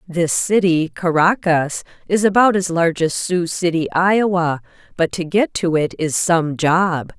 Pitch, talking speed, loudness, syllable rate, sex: 175 Hz, 160 wpm, -17 LUFS, 4.2 syllables/s, female